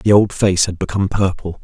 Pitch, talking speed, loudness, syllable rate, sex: 95 Hz, 220 wpm, -17 LUFS, 5.7 syllables/s, male